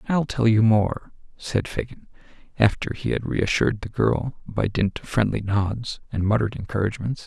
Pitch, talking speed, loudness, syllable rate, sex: 110 Hz, 165 wpm, -23 LUFS, 5.0 syllables/s, male